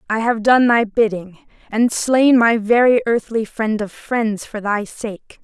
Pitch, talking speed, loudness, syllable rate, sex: 225 Hz, 175 wpm, -17 LUFS, 3.9 syllables/s, female